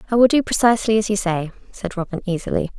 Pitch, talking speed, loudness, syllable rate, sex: 205 Hz, 215 wpm, -19 LUFS, 7.0 syllables/s, female